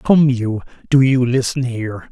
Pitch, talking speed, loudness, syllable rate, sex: 125 Hz, 170 wpm, -16 LUFS, 4.4 syllables/s, male